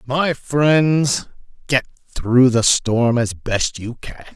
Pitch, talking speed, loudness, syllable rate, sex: 125 Hz, 140 wpm, -17 LUFS, 2.8 syllables/s, male